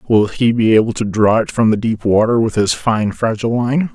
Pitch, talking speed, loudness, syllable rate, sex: 110 Hz, 245 wpm, -15 LUFS, 5.1 syllables/s, male